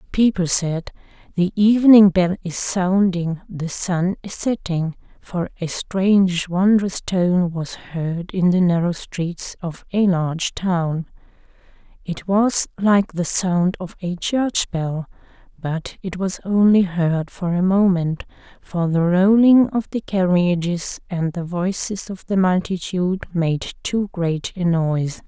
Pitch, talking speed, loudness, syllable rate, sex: 180 Hz, 140 wpm, -20 LUFS, 3.7 syllables/s, female